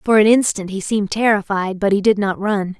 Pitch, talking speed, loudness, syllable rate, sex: 200 Hz, 235 wpm, -17 LUFS, 5.5 syllables/s, female